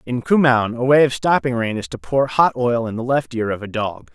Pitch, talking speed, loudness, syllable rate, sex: 125 Hz, 275 wpm, -18 LUFS, 5.2 syllables/s, male